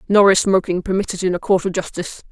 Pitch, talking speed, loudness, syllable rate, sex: 185 Hz, 235 wpm, -18 LUFS, 6.7 syllables/s, female